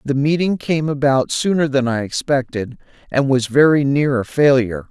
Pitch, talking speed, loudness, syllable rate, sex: 140 Hz, 170 wpm, -17 LUFS, 5.0 syllables/s, male